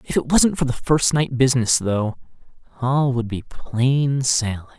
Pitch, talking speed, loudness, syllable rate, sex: 125 Hz, 175 wpm, -20 LUFS, 4.3 syllables/s, male